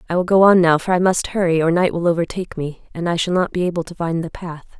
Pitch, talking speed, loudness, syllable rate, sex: 175 Hz, 300 wpm, -18 LUFS, 6.4 syllables/s, female